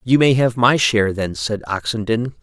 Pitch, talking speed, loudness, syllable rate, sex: 115 Hz, 200 wpm, -17 LUFS, 4.9 syllables/s, male